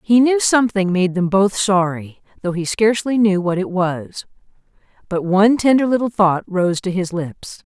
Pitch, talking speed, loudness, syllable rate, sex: 195 Hz, 180 wpm, -17 LUFS, 4.7 syllables/s, female